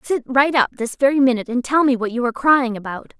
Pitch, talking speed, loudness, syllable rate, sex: 255 Hz, 265 wpm, -18 LUFS, 6.3 syllables/s, female